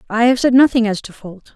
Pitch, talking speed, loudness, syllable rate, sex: 230 Hz, 270 wpm, -14 LUFS, 5.9 syllables/s, female